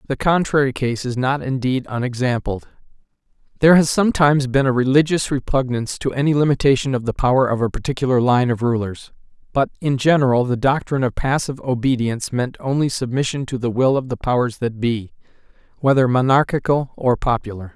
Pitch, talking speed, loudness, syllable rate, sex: 130 Hz, 165 wpm, -19 LUFS, 6.0 syllables/s, male